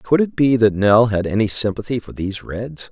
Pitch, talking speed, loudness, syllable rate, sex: 110 Hz, 225 wpm, -18 LUFS, 5.2 syllables/s, male